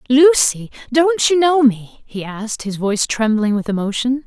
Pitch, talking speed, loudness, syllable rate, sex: 245 Hz, 170 wpm, -16 LUFS, 4.7 syllables/s, female